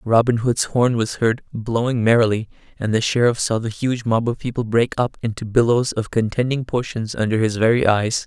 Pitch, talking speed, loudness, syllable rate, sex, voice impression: 115 Hz, 195 wpm, -20 LUFS, 5.2 syllables/s, male, masculine, adult-like, slightly soft, cool, refreshing, slightly calm, kind